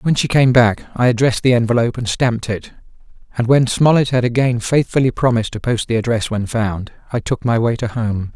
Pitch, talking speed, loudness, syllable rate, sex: 120 Hz, 215 wpm, -16 LUFS, 5.8 syllables/s, male